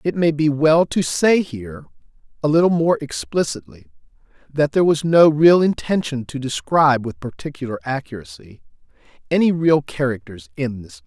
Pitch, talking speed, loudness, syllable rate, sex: 140 Hz, 150 wpm, -18 LUFS, 5.3 syllables/s, male